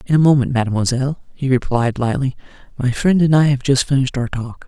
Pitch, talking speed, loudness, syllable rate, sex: 135 Hz, 205 wpm, -17 LUFS, 6.2 syllables/s, female